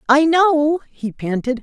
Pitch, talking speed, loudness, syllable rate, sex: 285 Hz, 150 wpm, -17 LUFS, 3.7 syllables/s, female